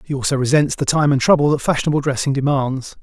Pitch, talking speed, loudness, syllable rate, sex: 140 Hz, 220 wpm, -17 LUFS, 6.5 syllables/s, male